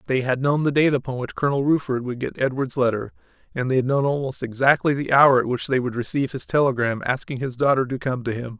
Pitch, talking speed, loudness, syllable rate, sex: 130 Hz, 245 wpm, -22 LUFS, 6.3 syllables/s, male